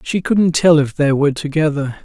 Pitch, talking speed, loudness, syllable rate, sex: 150 Hz, 205 wpm, -15 LUFS, 5.3 syllables/s, male